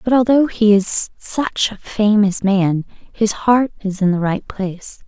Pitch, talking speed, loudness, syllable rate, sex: 210 Hz, 180 wpm, -17 LUFS, 3.9 syllables/s, female